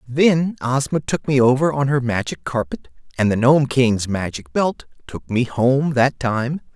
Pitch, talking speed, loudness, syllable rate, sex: 125 Hz, 180 wpm, -19 LUFS, 4.2 syllables/s, male